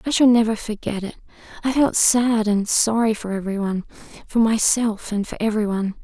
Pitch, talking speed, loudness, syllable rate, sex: 220 Hz, 170 wpm, -20 LUFS, 5.4 syllables/s, female